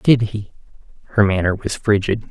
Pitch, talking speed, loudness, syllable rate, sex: 105 Hz, 155 wpm, -18 LUFS, 5.1 syllables/s, male